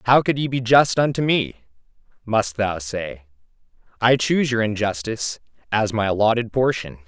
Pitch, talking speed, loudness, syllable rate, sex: 110 Hz, 135 wpm, -20 LUFS, 5.0 syllables/s, male